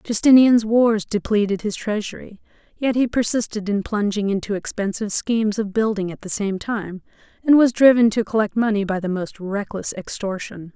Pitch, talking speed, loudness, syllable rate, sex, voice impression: 210 Hz, 165 wpm, -20 LUFS, 5.2 syllables/s, female, feminine, adult-like, friendly, slightly reassuring